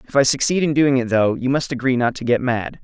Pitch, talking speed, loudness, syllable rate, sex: 130 Hz, 295 wpm, -18 LUFS, 6.0 syllables/s, male